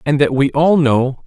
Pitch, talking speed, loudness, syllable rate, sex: 140 Hz, 240 wpm, -14 LUFS, 4.3 syllables/s, male